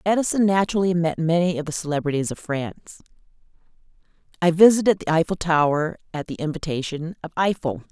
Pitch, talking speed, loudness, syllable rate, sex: 170 Hz, 145 wpm, -22 LUFS, 6.1 syllables/s, female